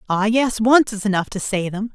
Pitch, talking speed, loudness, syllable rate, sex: 215 Hz, 245 wpm, -19 LUFS, 5.1 syllables/s, female